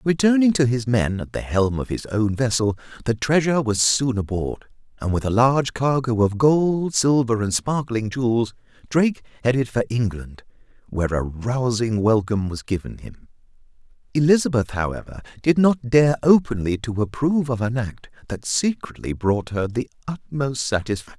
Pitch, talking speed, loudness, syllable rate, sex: 120 Hz, 160 wpm, -21 LUFS, 5.0 syllables/s, male